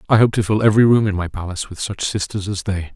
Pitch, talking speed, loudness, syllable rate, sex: 100 Hz, 285 wpm, -18 LUFS, 6.9 syllables/s, male